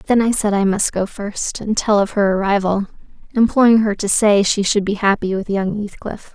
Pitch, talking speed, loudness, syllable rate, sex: 205 Hz, 220 wpm, -17 LUFS, 5.1 syllables/s, female